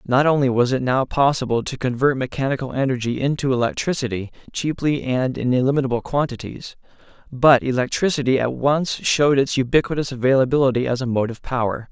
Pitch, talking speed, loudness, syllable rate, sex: 130 Hz, 145 wpm, -20 LUFS, 6.0 syllables/s, male